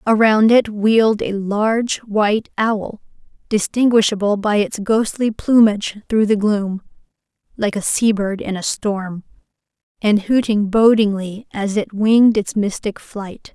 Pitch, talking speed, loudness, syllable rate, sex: 210 Hz, 135 wpm, -17 LUFS, 4.2 syllables/s, female